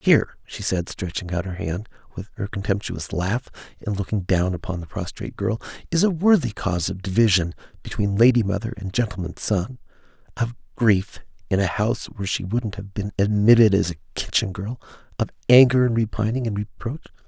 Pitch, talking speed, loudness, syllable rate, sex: 105 Hz, 175 wpm, -23 LUFS, 5.5 syllables/s, male